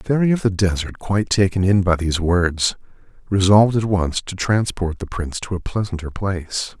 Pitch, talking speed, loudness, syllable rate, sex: 95 Hz, 195 wpm, -19 LUFS, 5.5 syllables/s, male